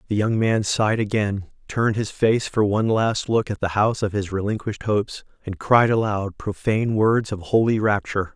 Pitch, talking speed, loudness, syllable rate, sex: 105 Hz, 185 wpm, -21 LUFS, 5.5 syllables/s, male